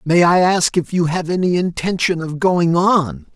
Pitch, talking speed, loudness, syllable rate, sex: 170 Hz, 195 wpm, -16 LUFS, 4.4 syllables/s, male